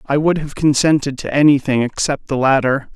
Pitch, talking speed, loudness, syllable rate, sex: 140 Hz, 185 wpm, -16 LUFS, 5.4 syllables/s, male